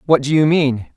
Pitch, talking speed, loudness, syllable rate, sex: 145 Hz, 250 wpm, -15 LUFS, 5.2 syllables/s, male